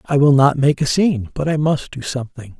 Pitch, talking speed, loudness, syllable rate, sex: 140 Hz, 255 wpm, -17 LUFS, 5.7 syllables/s, male